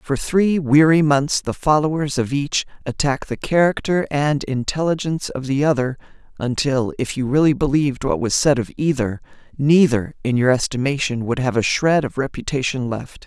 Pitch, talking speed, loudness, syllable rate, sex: 140 Hz, 165 wpm, -19 LUFS, 4.9 syllables/s, female